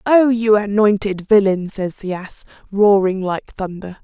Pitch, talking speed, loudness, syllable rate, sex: 200 Hz, 150 wpm, -17 LUFS, 4.2 syllables/s, female